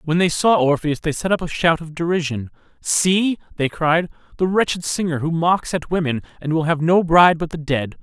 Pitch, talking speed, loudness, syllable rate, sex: 160 Hz, 215 wpm, -19 LUFS, 5.2 syllables/s, male